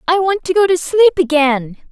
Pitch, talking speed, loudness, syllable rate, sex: 335 Hz, 220 wpm, -14 LUFS, 4.9 syllables/s, female